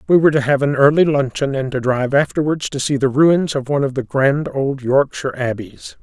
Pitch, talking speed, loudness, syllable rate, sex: 140 Hz, 230 wpm, -17 LUFS, 5.6 syllables/s, male